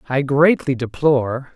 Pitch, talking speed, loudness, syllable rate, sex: 135 Hz, 115 wpm, -18 LUFS, 4.4 syllables/s, male